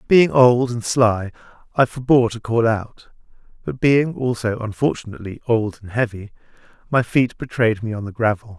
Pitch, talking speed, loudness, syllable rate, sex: 115 Hz, 160 wpm, -19 LUFS, 5.0 syllables/s, male